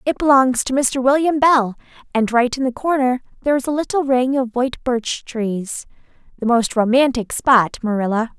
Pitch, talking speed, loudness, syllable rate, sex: 250 Hz, 170 wpm, -18 LUFS, 4.9 syllables/s, female